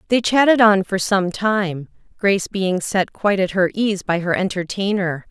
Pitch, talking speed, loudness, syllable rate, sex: 195 Hz, 180 wpm, -18 LUFS, 4.6 syllables/s, female